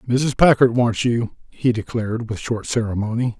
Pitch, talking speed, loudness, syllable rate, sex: 115 Hz, 160 wpm, -20 LUFS, 4.8 syllables/s, male